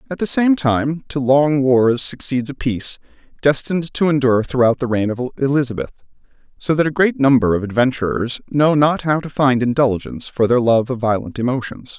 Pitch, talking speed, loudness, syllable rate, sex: 130 Hz, 185 wpm, -17 LUFS, 5.4 syllables/s, male